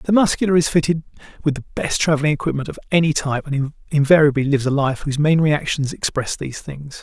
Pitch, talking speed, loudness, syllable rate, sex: 150 Hz, 195 wpm, -19 LUFS, 6.4 syllables/s, male